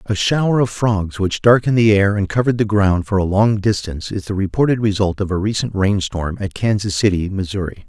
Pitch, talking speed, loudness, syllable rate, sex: 100 Hz, 215 wpm, -17 LUFS, 5.7 syllables/s, male